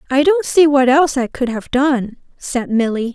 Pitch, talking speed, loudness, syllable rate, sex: 260 Hz, 210 wpm, -15 LUFS, 4.8 syllables/s, female